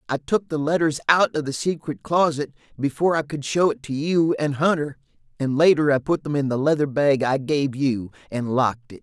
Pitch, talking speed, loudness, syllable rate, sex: 145 Hz, 220 wpm, -22 LUFS, 5.3 syllables/s, male